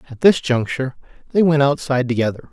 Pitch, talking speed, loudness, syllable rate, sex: 135 Hz, 165 wpm, -18 LUFS, 6.7 syllables/s, male